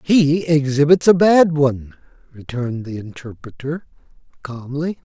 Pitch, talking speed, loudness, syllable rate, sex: 145 Hz, 105 wpm, -17 LUFS, 4.5 syllables/s, male